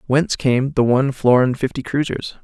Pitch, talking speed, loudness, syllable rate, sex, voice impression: 135 Hz, 175 wpm, -18 LUFS, 5.5 syllables/s, male, very masculine, adult-like, slightly thick, slightly tensed, slightly weak, slightly dark, soft, clear, fluent, slightly raspy, cool, intellectual, very refreshing, sincere, very calm, friendly, reassuring, slightly unique, slightly elegant, wild, slightly sweet, slightly lively, kind, very modest